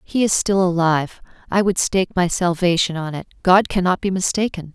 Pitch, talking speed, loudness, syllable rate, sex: 180 Hz, 190 wpm, -19 LUFS, 5.5 syllables/s, female